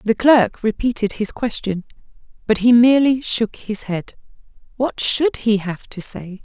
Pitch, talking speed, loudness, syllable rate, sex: 225 Hz, 160 wpm, -18 LUFS, 4.3 syllables/s, female